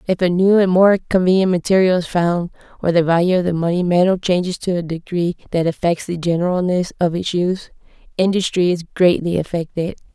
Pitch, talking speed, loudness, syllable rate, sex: 175 Hz, 185 wpm, -17 LUFS, 5.8 syllables/s, female